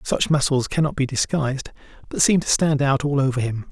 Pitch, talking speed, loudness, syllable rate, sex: 140 Hz, 225 wpm, -20 LUFS, 5.5 syllables/s, male